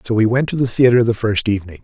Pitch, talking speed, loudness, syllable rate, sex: 115 Hz, 295 wpm, -16 LUFS, 7.0 syllables/s, male